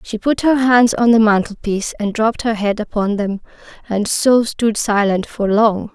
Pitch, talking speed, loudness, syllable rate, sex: 215 Hz, 190 wpm, -16 LUFS, 4.7 syllables/s, female